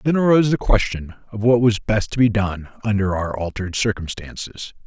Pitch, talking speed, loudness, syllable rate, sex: 105 Hz, 185 wpm, -20 LUFS, 5.5 syllables/s, male